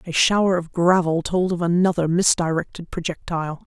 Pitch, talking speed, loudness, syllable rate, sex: 175 Hz, 145 wpm, -20 LUFS, 5.4 syllables/s, female